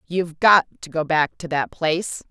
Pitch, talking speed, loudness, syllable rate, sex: 165 Hz, 210 wpm, -20 LUFS, 5.1 syllables/s, female